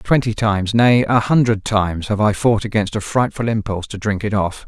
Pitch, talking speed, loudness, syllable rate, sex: 105 Hz, 220 wpm, -17 LUFS, 5.4 syllables/s, male